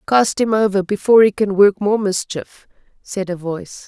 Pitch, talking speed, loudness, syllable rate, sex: 200 Hz, 185 wpm, -16 LUFS, 5.0 syllables/s, female